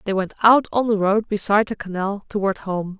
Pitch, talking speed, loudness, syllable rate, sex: 200 Hz, 220 wpm, -20 LUFS, 5.6 syllables/s, female